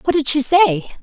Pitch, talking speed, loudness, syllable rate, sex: 285 Hz, 235 wpm, -15 LUFS, 4.4 syllables/s, female